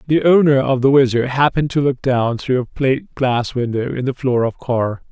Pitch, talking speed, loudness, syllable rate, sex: 130 Hz, 225 wpm, -17 LUFS, 5.1 syllables/s, male